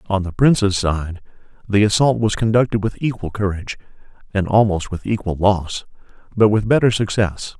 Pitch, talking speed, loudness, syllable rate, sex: 100 Hz, 160 wpm, -18 LUFS, 5.3 syllables/s, male